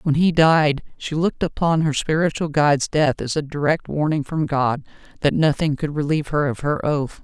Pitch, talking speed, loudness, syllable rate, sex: 150 Hz, 200 wpm, -20 LUFS, 5.1 syllables/s, female